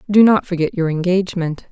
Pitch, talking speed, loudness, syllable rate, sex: 180 Hz, 175 wpm, -17 LUFS, 5.9 syllables/s, female